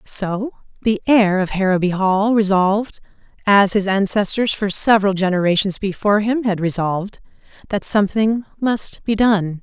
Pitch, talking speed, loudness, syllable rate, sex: 200 Hz, 135 wpm, -17 LUFS, 4.8 syllables/s, female